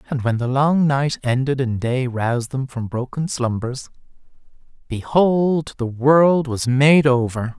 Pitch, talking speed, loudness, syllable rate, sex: 135 Hz, 150 wpm, -19 LUFS, 3.9 syllables/s, male